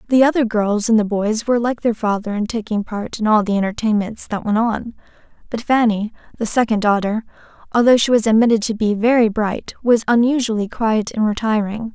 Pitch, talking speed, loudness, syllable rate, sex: 220 Hz, 190 wpm, -18 LUFS, 5.5 syllables/s, female